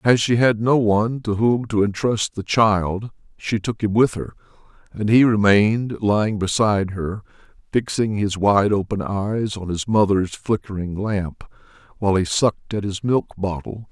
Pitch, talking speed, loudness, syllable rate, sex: 105 Hz, 170 wpm, -20 LUFS, 4.5 syllables/s, male